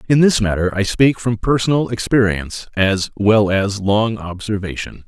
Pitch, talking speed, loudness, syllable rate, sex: 105 Hz, 155 wpm, -17 LUFS, 4.7 syllables/s, male